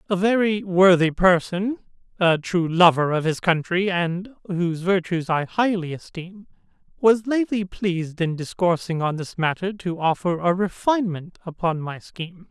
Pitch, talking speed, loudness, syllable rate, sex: 180 Hz, 150 wpm, -22 LUFS, 4.7 syllables/s, male